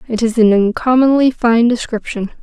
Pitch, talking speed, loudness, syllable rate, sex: 230 Hz, 150 wpm, -13 LUFS, 5.0 syllables/s, female